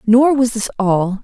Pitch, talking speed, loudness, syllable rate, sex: 225 Hz, 195 wpm, -15 LUFS, 3.9 syllables/s, female